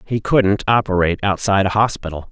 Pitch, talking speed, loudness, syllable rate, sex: 100 Hz, 155 wpm, -17 LUFS, 6.1 syllables/s, male